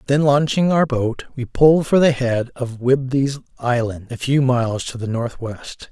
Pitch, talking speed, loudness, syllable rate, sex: 130 Hz, 180 wpm, -19 LUFS, 4.5 syllables/s, male